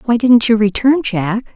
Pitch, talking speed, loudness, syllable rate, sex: 225 Hz, 195 wpm, -13 LUFS, 4.4 syllables/s, female